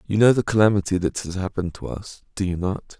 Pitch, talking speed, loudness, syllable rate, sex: 95 Hz, 240 wpm, -22 LUFS, 6.1 syllables/s, male